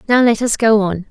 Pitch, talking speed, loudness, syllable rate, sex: 220 Hz, 270 wpm, -14 LUFS, 5.4 syllables/s, female